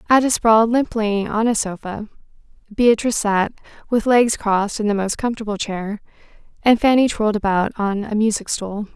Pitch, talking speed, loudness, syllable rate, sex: 215 Hz, 160 wpm, -19 LUFS, 5.4 syllables/s, female